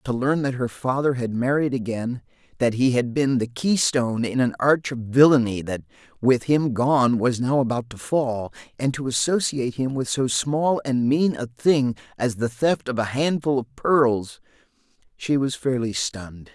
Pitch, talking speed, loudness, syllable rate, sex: 130 Hz, 180 wpm, -22 LUFS, 4.6 syllables/s, male